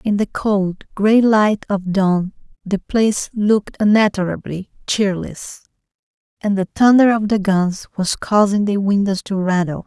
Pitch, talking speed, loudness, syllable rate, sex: 200 Hz, 145 wpm, -17 LUFS, 4.3 syllables/s, female